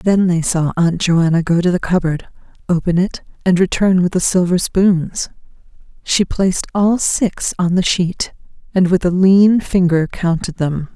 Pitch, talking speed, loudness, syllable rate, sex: 180 Hz, 170 wpm, -15 LUFS, 4.3 syllables/s, female